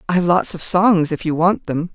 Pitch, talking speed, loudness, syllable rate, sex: 175 Hz, 280 wpm, -16 LUFS, 5.0 syllables/s, female